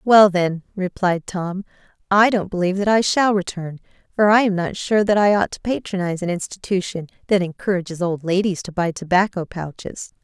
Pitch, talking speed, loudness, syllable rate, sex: 190 Hz, 180 wpm, -20 LUFS, 5.4 syllables/s, female